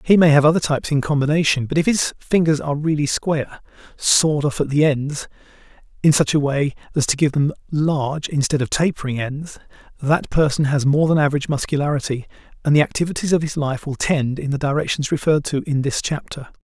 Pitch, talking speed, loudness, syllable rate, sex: 145 Hz, 190 wpm, -19 LUFS, 6.1 syllables/s, male